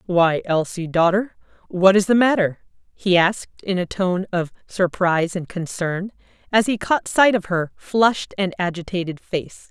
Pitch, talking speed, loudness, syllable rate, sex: 185 Hz, 160 wpm, -20 LUFS, 4.5 syllables/s, female